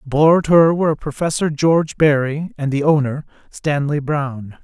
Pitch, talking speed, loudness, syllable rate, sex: 150 Hz, 155 wpm, -17 LUFS, 5.1 syllables/s, male